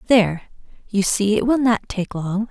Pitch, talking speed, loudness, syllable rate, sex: 210 Hz, 190 wpm, -20 LUFS, 4.8 syllables/s, female